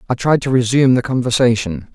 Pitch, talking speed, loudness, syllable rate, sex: 120 Hz, 185 wpm, -15 LUFS, 6.4 syllables/s, male